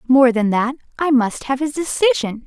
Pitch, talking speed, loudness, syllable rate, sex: 265 Hz, 195 wpm, -18 LUFS, 4.8 syllables/s, female